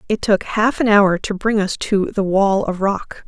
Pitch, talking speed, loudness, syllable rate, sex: 210 Hz, 240 wpm, -17 LUFS, 4.2 syllables/s, female